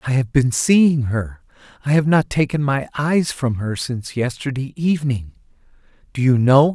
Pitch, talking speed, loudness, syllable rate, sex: 135 Hz, 170 wpm, -18 LUFS, 4.7 syllables/s, male